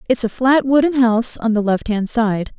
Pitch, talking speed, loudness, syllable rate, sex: 235 Hz, 230 wpm, -17 LUFS, 5.2 syllables/s, female